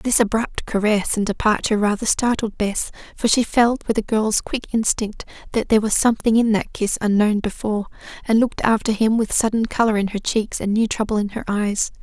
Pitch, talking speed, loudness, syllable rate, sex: 215 Hz, 205 wpm, -20 LUFS, 5.6 syllables/s, female